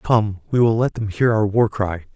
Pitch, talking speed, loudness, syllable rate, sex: 110 Hz, 250 wpm, -19 LUFS, 4.6 syllables/s, male